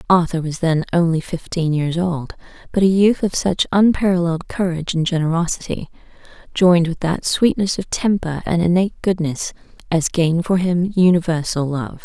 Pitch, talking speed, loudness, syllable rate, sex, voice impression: 175 Hz, 155 wpm, -18 LUFS, 5.3 syllables/s, female, feminine, adult-like, tensed, slightly bright, soft, slightly fluent, intellectual, calm, friendly, reassuring, elegant, kind, slightly modest